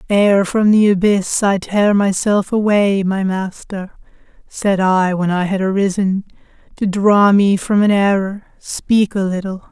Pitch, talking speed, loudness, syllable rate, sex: 195 Hz, 155 wpm, -15 LUFS, 3.9 syllables/s, female